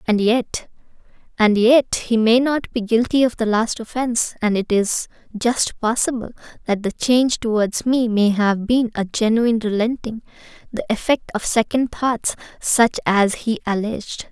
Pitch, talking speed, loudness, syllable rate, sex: 225 Hz, 150 wpm, -19 LUFS, 4.6 syllables/s, female